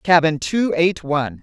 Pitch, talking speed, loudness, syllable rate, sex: 170 Hz, 170 wpm, -18 LUFS, 4.4 syllables/s, female